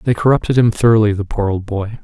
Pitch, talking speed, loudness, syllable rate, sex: 110 Hz, 235 wpm, -15 LUFS, 6.3 syllables/s, male